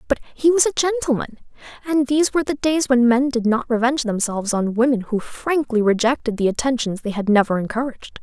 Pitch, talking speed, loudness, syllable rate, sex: 250 Hz, 195 wpm, -19 LUFS, 6.0 syllables/s, female